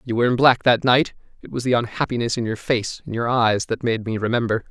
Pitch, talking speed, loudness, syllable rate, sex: 115 Hz, 255 wpm, -20 LUFS, 6.1 syllables/s, male